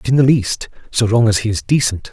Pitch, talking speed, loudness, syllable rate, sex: 115 Hz, 285 wpm, -16 LUFS, 6.5 syllables/s, male